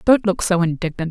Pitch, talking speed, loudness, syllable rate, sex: 180 Hz, 215 wpm, -19 LUFS, 5.7 syllables/s, female